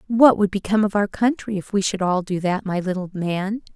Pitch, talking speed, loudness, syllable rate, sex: 200 Hz, 240 wpm, -21 LUFS, 5.5 syllables/s, female